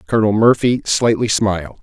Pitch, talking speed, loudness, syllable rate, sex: 105 Hz, 130 wpm, -15 LUFS, 5.5 syllables/s, male